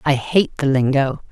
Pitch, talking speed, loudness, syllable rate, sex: 140 Hz, 180 wpm, -18 LUFS, 4.6 syllables/s, female